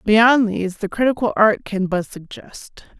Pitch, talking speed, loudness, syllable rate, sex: 210 Hz, 160 wpm, -18 LUFS, 4.4 syllables/s, female